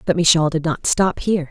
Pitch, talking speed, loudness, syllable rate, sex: 165 Hz, 240 wpm, -17 LUFS, 5.8 syllables/s, female